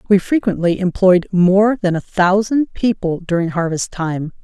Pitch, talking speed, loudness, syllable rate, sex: 190 Hz, 150 wpm, -16 LUFS, 4.4 syllables/s, female